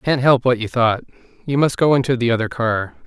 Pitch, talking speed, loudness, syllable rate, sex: 125 Hz, 215 wpm, -18 LUFS, 5.7 syllables/s, male